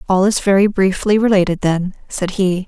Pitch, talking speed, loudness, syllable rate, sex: 190 Hz, 180 wpm, -16 LUFS, 5.1 syllables/s, female